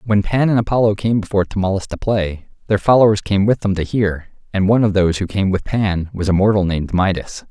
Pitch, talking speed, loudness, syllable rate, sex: 100 Hz, 240 wpm, -17 LUFS, 6.1 syllables/s, male